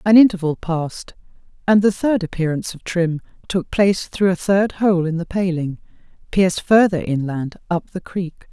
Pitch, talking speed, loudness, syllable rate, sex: 180 Hz, 170 wpm, -19 LUFS, 4.9 syllables/s, female